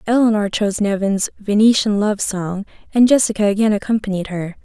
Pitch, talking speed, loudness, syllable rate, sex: 205 Hz, 140 wpm, -17 LUFS, 5.6 syllables/s, female